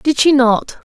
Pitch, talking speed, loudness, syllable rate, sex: 270 Hz, 200 wpm, -13 LUFS, 3.8 syllables/s, female